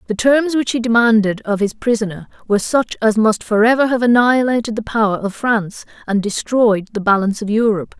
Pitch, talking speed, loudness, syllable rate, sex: 225 Hz, 190 wpm, -16 LUFS, 5.8 syllables/s, female